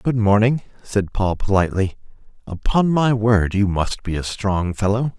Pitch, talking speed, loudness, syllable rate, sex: 105 Hz, 160 wpm, -20 LUFS, 4.5 syllables/s, male